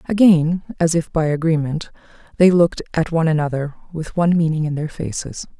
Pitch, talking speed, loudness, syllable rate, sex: 160 Hz, 170 wpm, -18 LUFS, 5.8 syllables/s, female